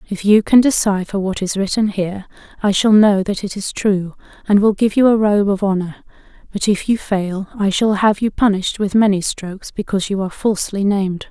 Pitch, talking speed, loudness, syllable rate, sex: 200 Hz, 210 wpm, -16 LUFS, 5.6 syllables/s, female